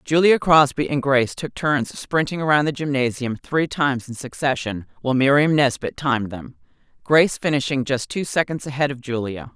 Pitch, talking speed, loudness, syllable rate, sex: 140 Hz, 170 wpm, -20 LUFS, 5.4 syllables/s, female